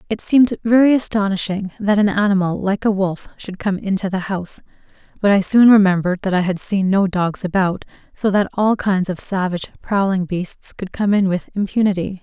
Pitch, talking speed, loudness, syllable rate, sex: 195 Hz, 190 wpm, -18 LUFS, 5.4 syllables/s, female